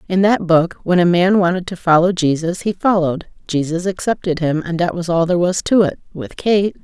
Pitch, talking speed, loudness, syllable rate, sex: 175 Hz, 220 wpm, -16 LUFS, 5.5 syllables/s, female